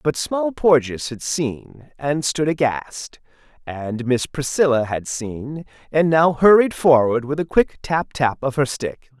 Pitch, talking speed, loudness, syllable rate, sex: 140 Hz, 165 wpm, -19 LUFS, 3.8 syllables/s, male